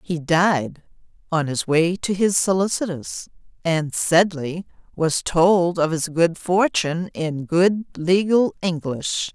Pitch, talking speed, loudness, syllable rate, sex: 170 Hz, 130 wpm, -20 LUFS, 3.5 syllables/s, female